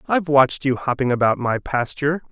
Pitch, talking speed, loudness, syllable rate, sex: 135 Hz, 180 wpm, -20 LUFS, 6.2 syllables/s, male